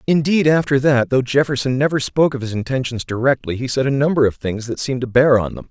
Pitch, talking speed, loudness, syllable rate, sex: 130 Hz, 240 wpm, -18 LUFS, 6.3 syllables/s, male